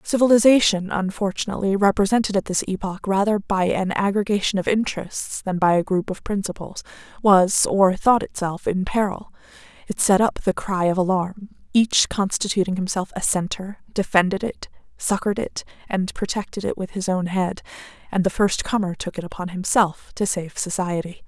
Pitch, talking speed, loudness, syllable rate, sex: 195 Hz, 165 wpm, -21 LUFS, 5.3 syllables/s, female